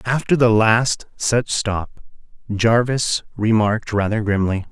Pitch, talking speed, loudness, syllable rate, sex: 110 Hz, 115 wpm, -18 LUFS, 3.8 syllables/s, male